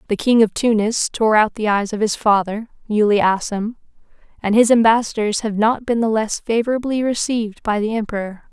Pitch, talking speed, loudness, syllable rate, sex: 220 Hz, 185 wpm, -18 LUFS, 5.4 syllables/s, female